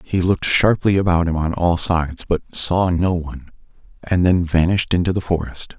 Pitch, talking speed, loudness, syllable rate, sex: 85 Hz, 185 wpm, -18 LUFS, 5.4 syllables/s, male